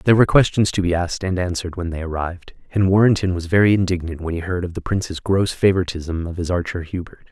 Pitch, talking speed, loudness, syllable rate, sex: 90 Hz, 230 wpm, -20 LUFS, 6.8 syllables/s, male